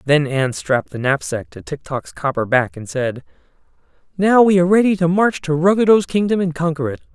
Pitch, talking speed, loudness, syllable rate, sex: 155 Hz, 200 wpm, -17 LUFS, 5.5 syllables/s, male